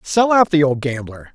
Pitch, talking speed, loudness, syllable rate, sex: 155 Hz, 225 wpm, -16 LUFS, 5.0 syllables/s, male